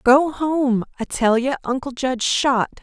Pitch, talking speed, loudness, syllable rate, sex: 260 Hz, 150 wpm, -20 LUFS, 3.8 syllables/s, female